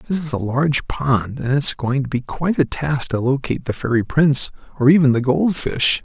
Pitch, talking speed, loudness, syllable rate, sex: 135 Hz, 230 wpm, -19 LUFS, 5.2 syllables/s, male